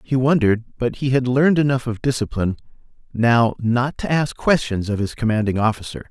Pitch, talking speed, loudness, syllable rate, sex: 120 Hz, 175 wpm, -19 LUFS, 5.7 syllables/s, male